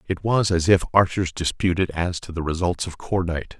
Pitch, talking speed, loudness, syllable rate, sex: 90 Hz, 200 wpm, -22 LUFS, 5.4 syllables/s, male